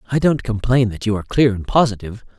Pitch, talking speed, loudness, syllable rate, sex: 115 Hz, 225 wpm, -18 LUFS, 7.0 syllables/s, male